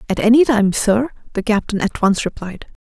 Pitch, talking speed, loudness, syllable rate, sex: 220 Hz, 190 wpm, -17 LUFS, 5.2 syllables/s, female